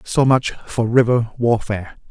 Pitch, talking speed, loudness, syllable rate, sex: 120 Hz, 145 wpm, -18 LUFS, 4.2 syllables/s, male